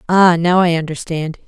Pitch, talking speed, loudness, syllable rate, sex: 170 Hz, 165 wpm, -15 LUFS, 4.9 syllables/s, female